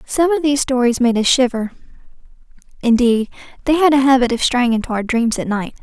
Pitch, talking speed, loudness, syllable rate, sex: 250 Hz, 195 wpm, -16 LUFS, 2.9 syllables/s, female